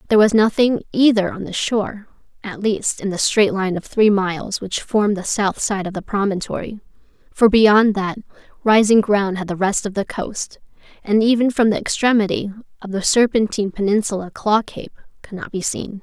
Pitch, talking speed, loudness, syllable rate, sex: 205 Hz, 185 wpm, -18 LUFS, 5.2 syllables/s, female